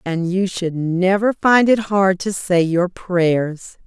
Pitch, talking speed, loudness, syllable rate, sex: 185 Hz, 170 wpm, -17 LUFS, 3.2 syllables/s, female